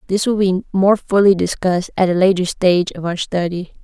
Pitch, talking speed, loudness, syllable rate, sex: 185 Hz, 205 wpm, -16 LUFS, 6.0 syllables/s, female